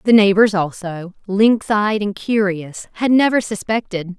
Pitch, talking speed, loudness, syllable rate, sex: 205 Hz, 145 wpm, -17 LUFS, 4.2 syllables/s, female